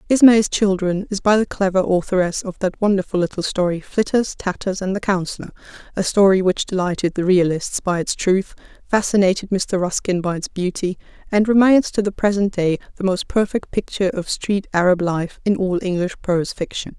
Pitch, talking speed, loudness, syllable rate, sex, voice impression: 190 Hz, 180 wpm, -19 LUFS, 5.5 syllables/s, female, feminine, adult-like, relaxed, slightly weak, slightly dark, soft, muffled, fluent, raspy, calm, slightly reassuring, elegant, slightly kind, modest